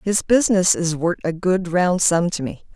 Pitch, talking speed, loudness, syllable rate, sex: 180 Hz, 220 wpm, -19 LUFS, 4.8 syllables/s, female